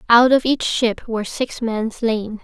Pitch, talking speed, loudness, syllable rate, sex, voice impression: 230 Hz, 195 wpm, -19 LUFS, 4.1 syllables/s, female, very feminine, young, slightly adult-like, thin, tensed, powerful, slightly bright, very hard, very clear, fluent, slightly cute, cool, intellectual, refreshing, very sincere, calm, slightly friendly, reassuring, slightly unique, elegant, slightly sweet, slightly lively, strict, sharp, slightly modest